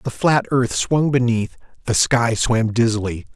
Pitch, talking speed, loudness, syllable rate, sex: 120 Hz, 160 wpm, -18 LUFS, 4.1 syllables/s, male